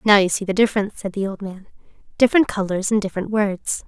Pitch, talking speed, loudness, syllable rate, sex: 200 Hz, 215 wpm, -20 LUFS, 6.8 syllables/s, female